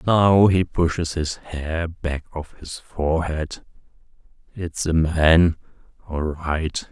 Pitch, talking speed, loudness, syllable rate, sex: 80 Hz, 115 wpm, -21 LUFS, 3.4 syllables/s, male